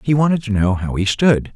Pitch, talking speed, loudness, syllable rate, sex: 115 Hz, 270 wpm, -17 LUFS, 5.5 syllables/s, male